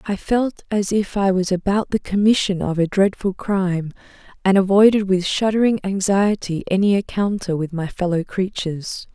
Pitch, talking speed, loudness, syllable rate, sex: 195 Hz, 160 wpm, -19 LUFS, 4.9 syllables/s, female